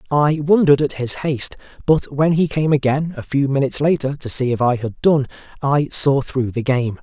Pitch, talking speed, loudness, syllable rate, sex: 140 Hz, 215 wpm, -18 LUFS, 5.3 syllables/s, male